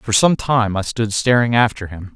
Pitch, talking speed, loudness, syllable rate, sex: 110 Hz, 225 wpm, -17 LUFS, 4.7 syllables/s, male